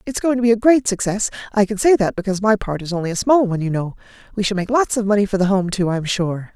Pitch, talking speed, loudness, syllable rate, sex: 205 Hz, 295 wpm, -18 LUFS, 6.7 syllables/s, female